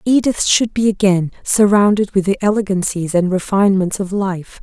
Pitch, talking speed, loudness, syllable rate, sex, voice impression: 195 Hz, 155 wpm, -15 LUFS, 5.1 syllables/s, female, feminine, adult-like, relaxed, slightly weak, soft, raspy, intellectual, calm, reassuring, elegant, kind, modest